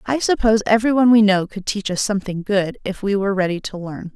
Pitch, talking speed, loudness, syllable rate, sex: 205 Hz, 230 wpm, -18 LUFS, 6.3 syllables/s, female